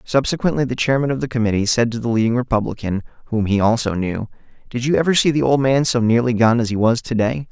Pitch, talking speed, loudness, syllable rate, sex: 120 Hz, 240 wpm, -18 LUFS, 6.4 syllables/s, male